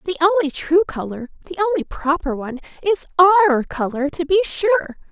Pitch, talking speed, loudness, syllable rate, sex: 330 Hz, 140 wpm, -19 LUFS, 5.5 syllables/s, female